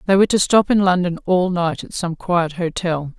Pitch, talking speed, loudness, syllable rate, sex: 175 Hz, 225 wpm, -18 LUFS, 5.0 syllables/s, female